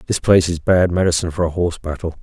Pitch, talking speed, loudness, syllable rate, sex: 85 Hz, 245 wpm, -17 LUFS, 7.4 syllables/s, male